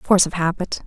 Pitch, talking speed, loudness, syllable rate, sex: 175 Hz, 210 wpm, -20 LUFS, 6.2 syllables/s, female